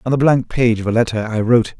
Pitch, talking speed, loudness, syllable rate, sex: 115 Hz, 300 wpm, -16 LUFS, 6.6 syllables/s, male